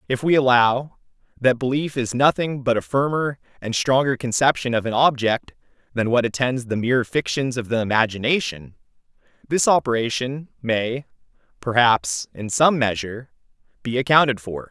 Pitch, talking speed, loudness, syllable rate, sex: 125 Hz, 145 wpm, -20 LUFS, 5.0 syllables/s, male